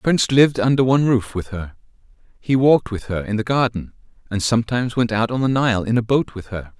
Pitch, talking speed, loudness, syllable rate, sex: 115 Hz, 240 wpm, -19 LUFS, 6.3 syllables/s, male